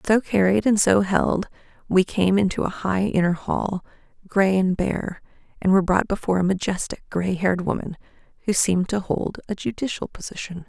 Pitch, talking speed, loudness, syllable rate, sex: 185 Hz, 175 wpm, -22 LUFS, 5.3 syllables/s, female